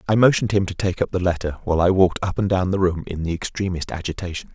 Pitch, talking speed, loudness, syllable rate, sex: 90 Hz, 265 wpm, -21 LUFS, 7.1 syllables/s, male